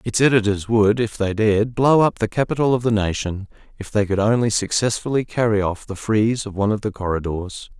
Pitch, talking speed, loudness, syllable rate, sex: 110 Hz, 210 wpm, -20 LUFS, 5.8 syllables/s, male